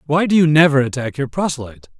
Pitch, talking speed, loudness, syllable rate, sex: 145 Hz, 210 wpm, -16 LUFS, 6.7 syllables/s, male